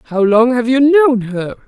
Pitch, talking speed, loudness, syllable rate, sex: 240 Hz, 215 wpm, -12 LUFS, 3.9 syllables/s, female